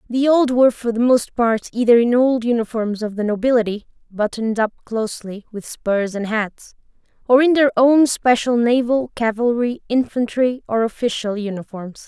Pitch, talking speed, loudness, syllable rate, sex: 235 Hz, 160 wpm, -18 LUFS, 4.9 syllables/s, female